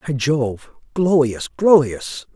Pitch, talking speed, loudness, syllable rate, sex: 140 Hz, 100 wpm, -18 LUFS, 3.3 syllables/s, male